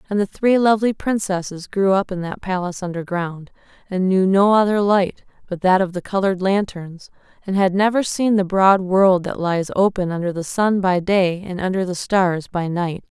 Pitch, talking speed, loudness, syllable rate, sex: 190 Hz, 195 wpm, -19 LUFS, 4.9 syllables/s, female